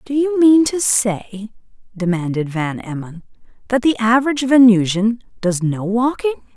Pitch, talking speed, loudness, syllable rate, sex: 225 Hz, 135 wpm, -16 LUFS, 4.6 syllables/s, female